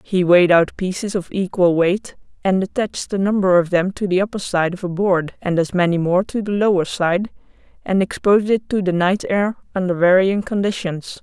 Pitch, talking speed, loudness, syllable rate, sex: 190 Hz, 205 wpm, -18 LUFS, 5.3 syllables/s, female